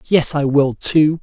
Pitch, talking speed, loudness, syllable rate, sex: 145 Hz, 195 wpm, -15 LUFS, 3.5 syllables/s, male